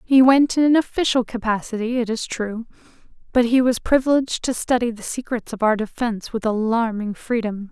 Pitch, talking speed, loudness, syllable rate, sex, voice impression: 235 Hz, 180 wpm, -20 LUFS, 5.5 syllables/s, female, feminine, slightly adult-like, cute, slightly refreshing, sincere, slightly friendly